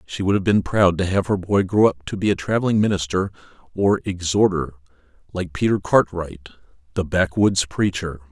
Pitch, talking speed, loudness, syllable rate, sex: 90 Hz, 175 wpm, -20 LUFS, 5.2 syllables/s, male